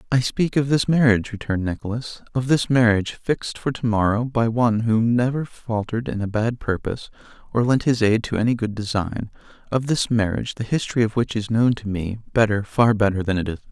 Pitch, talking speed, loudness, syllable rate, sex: 115 Hz, 215 wpm, -21 LUFS, 6.0 syllables/s, male